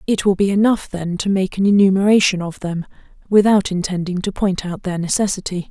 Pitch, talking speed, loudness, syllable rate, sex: 190 Hz, 190 wpm, -17 LUFS, 5.6 syllables/s, female